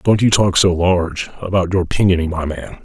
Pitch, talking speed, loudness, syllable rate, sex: 90 Hz, 210 wpm, -16 LUFS, 5.4 syllables/s, male